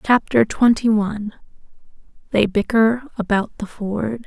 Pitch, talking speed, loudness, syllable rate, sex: 220 Hz, 100 wpm, -19 LUFS, 4.2 syllables/s, female